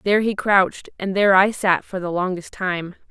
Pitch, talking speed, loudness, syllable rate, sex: 190 Hz, 215 wpm, -20 LUFS, 5.4 syllables/s, female